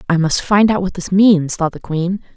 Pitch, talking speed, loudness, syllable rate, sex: 180 Hz, 255 wpm, -15 LUFS, 4.8 syllables/s, female